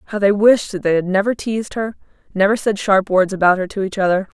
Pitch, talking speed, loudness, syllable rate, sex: 200 Hz, 245 wpm, -17 LUFS, 6.2 syllables/s, female